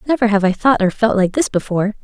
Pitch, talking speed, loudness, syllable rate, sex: 215 Hz, 265 wpm, -16 LUFS, 6.6 syllables/s, female